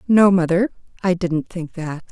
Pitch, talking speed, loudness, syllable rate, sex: 180 Hz, 170 wpm, -19 LUFS, 4.3 syllables/s, female